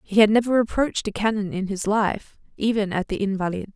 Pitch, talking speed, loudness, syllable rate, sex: 205 Hz, 210 wpm, -22 LUFS, 6.0 syllables/s, female